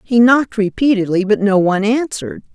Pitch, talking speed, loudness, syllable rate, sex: 215 Hz, 165 wpm, -14 LUFS, 5.9 syllables/s, female